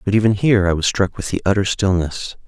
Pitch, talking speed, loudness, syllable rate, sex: 100 Hz, 240 wpm, -18 LUFS, 6.2 syllables/s, male